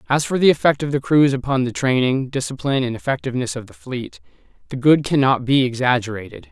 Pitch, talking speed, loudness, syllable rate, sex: 135 Hz, 195 wpm, -19 LUFS, 6.4 syllables/s, male